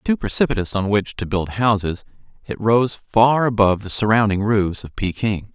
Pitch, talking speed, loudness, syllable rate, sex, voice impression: 105 Hz, 175 wpm, -19 LUFS, 5.0 syllables/s, male, very masculine, slightly adult-like, slightly thick, very tensed, powerful, very bright, soft, slightly muffled, fluent, slightly raspy, cool, intellectual, very refreshing, sincere, calm, mature, very friendly, very reassuring, unique, elegant, wild, very sweet, lively, kind, slightly intense, slightly modest